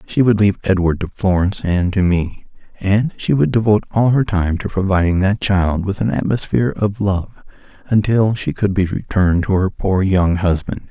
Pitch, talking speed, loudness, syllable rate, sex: 95 Hz, 185 wpm, -17 LUFS, 5.1 syllables/s, male